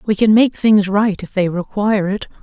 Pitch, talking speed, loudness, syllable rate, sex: 205 Hz, 225 wpm, -15 LUFS, 5.0 syllables/s, female